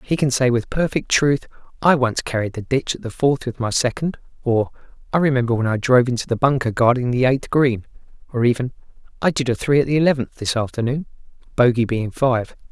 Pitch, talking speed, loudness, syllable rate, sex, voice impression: 125 Hz, 205 wpm, -20 LUFS, 5.9 syllables/s, male, masculine, adult-like, fluent, slightly refreshing, sincere